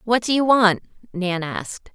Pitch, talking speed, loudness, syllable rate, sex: 210 Hz, 185 wpm, -20 LUFS, 4.4 syllables/s, female